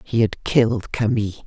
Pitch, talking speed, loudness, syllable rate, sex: 110 Hz, 165 wpm, -20 LUFS, 5.7 syllables/s, female